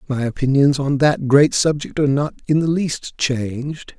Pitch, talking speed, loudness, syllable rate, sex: 140 Hz, 180 wpm, -18 LUFS, 4.6 syllables/s, male